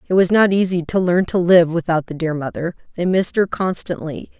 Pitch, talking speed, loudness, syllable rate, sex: 175 Hz, 220 wpm, -18 LUFS, 5.5 syllables/s, female